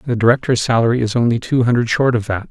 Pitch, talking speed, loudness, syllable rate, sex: 120 Hz, 240 wpm, -16 LUFS, 6.8 syllables/s, male